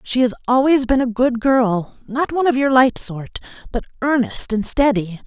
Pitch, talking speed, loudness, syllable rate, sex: 245 Hz, 195 wpm, -18 LUFS, 4.9 syllables/s, female